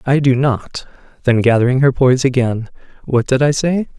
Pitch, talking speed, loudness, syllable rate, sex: 130 Hz, 180 wpm, -15 LUFS, 5.3 syllables/s, male